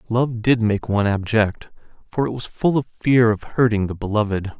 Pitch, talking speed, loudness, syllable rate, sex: 110 Hz, 195 wpm, -20 LUFS, 5.0 syllables/s, male